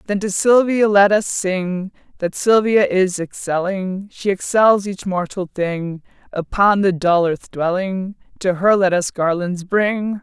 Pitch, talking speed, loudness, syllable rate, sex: 190 Hz, 155 wpm, -18 LUFS, 3.8 syllables/s, female